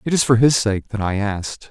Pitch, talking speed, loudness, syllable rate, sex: 110 Hz, 280 wpm, -18 LUFS, 5.6 syllables/s, male